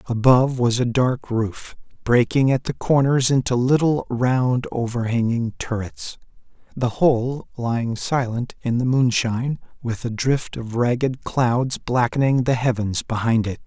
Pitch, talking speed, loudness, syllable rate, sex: 125 Hz, 140 wpm, -21 LUFS, 4.3 syllables/s, male